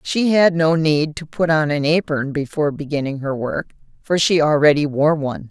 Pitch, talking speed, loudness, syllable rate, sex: 150 Hz, 195 wpm, -18 LUFS, 5.1 syllables/s, female